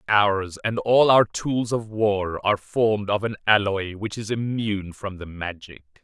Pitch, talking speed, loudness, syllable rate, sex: 105 Hz, 180 wpm, -23 LUFS, 4.3 syllables/s, male